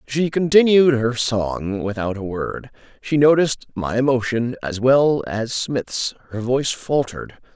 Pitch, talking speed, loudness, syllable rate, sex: 125 Hz, 145 wpm, -19 LUFS, 4.2 syllables/s, male